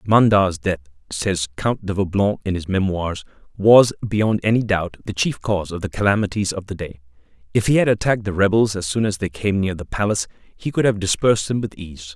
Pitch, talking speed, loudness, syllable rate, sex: 100 Hz, 210 wpm, -20 LUFS, 5.6 syllables/s, male